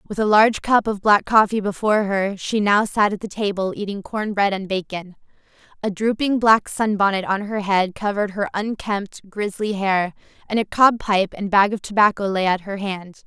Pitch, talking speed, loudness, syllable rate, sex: 205 Hz, 200 wpm, -20 LUFS, 5.0 syllables/s, female